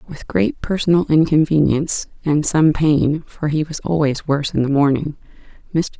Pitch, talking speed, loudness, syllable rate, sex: 155 Hz, 140 wpm, -18 LUFS, 4.9 syllables/s, female